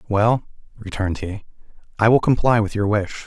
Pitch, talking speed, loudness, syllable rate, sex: 105 Hz, 165 wpm, -20 LUFS, 5.3 syllables/s, male